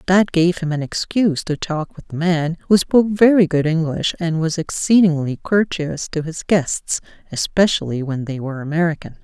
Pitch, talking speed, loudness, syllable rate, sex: 165 Hz, 170 wpm, -18 LUFS, 5.1 syllables/s, female